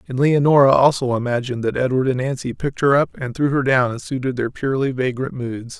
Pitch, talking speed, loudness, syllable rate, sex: 130 Hz, 220 wpm, -19 LUFS, 6.0 syllables/s, male